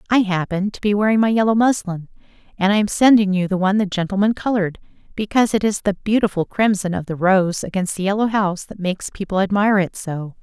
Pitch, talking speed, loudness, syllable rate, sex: 200 Hz, 215 wpm, -19 LUFS, 6.4 syllables/s, female